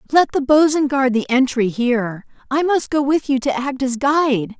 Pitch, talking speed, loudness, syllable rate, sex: 265 Hz, 210 wpm, -17 LUFS, 4.7 syllables/s, female